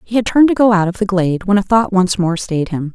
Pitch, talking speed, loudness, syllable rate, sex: 195 Hz, 325 wpm, -14 LUFS, 6.3 syllables/s, female